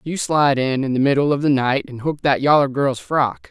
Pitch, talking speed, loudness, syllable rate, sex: 135 Hz, 255 wpm, -18 LUFS, 5.3 syllables/s, male